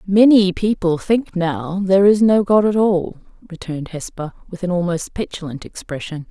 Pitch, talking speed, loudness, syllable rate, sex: 185 Hz, 160 wpm, -17 LUFS, 4.9 syllables/s, female